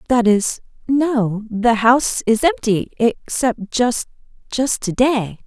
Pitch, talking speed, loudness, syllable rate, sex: 230 Hz, 110 wpm, -18 LUFS, 3.4 syllables/s, female